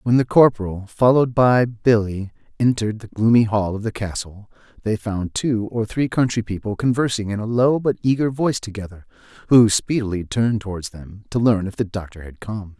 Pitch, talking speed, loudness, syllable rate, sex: 110 Hz, 190 wpm, -20 LUFS, 5.4 syllables/s, male